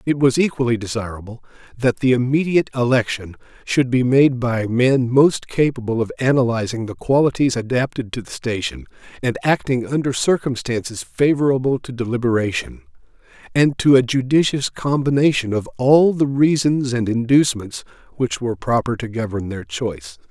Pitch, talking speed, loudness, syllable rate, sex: 125 Hz, 140 wpm, -19 LUFS, 5.2 syllables/s, male